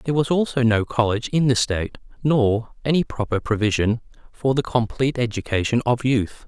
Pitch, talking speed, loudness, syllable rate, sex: 120 Hz, 165 wpm, -21 LUFS, 5.7 syllables/s, male